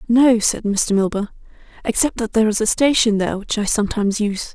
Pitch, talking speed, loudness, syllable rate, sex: 215 Hz, 200 wpm, -18 LUFS, 6.3 syllables/s, female